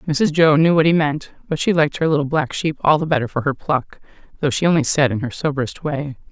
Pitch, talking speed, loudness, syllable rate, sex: 150 Hz, 255 wpm, -18 LUFS, 6.0 syllables/s, female